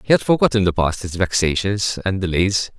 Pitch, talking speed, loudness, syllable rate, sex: 95 Hz, 195 wpm, -19 LUFS, 5.4 syllables/s, male